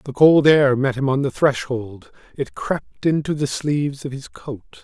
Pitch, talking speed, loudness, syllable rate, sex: 135 Hz, 200 wpm, -19 LUFS, 4.5 syllables/s, male